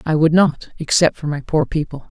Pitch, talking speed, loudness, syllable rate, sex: 155 Hz, 190 wpm, -17 LUFS, 5.2 syllables/s, female